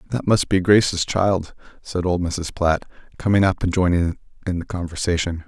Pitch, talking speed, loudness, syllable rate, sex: 90 Hz, 175 wpm, -21 LUFS, 5.0 syllables/s, male